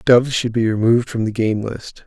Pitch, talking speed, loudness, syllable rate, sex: 115 Hz, 235 wpm, -18 LUFS, 5.6 syllables/s, male